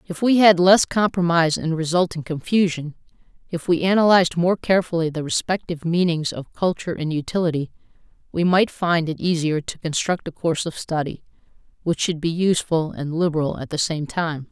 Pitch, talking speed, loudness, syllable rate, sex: 170 Hz, 170 wpm, -21 LUFS, 5.6 syllables/s, female